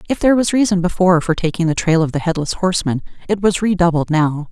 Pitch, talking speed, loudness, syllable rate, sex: 175 Hz, 225 wpm, -16 LUFS, 6.6 syllables/s, female